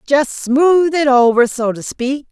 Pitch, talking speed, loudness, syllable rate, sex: 270 Hz, 180 wpm, -14 LUFS, 3.7 syllables/s, female